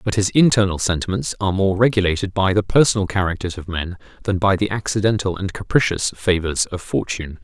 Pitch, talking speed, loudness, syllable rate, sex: 95 Hz, 180 wpm, -19 LUFS, 6.0 syllables/s, male